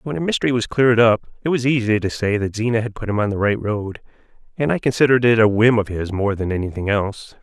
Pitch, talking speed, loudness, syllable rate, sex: 110 Hz, 260 wpm, -19 LUFS, 6.5 syllables/s, male